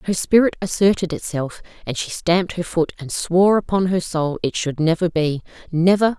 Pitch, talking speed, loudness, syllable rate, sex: 175 Hz, 185 wpm, -19 LUFS, 5.2 syllables/s, female